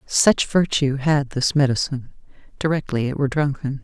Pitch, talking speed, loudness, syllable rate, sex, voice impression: 140 Hz, 140 wpm, -20 LUFS, 5.2 syllables/s, female, feminine, middle-aged, slightly thick, tensed, slightly powerful, slightly hard, clear, fluent, intellectual, calm, elegant, slightly lively, strict, sharp